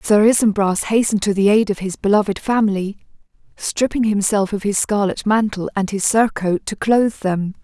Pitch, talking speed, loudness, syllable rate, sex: 205 Hz, 175 wpm, -18 LUFS, 5.3 syllables/s, female